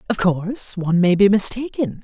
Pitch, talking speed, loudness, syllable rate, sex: 200 Hz, 175 wpm, -18 LUFS, 5.5 syllables/s, female